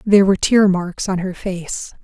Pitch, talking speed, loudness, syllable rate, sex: 190 Hz, 205 wpm, -17 LUFS, 5.0 syllables/s, female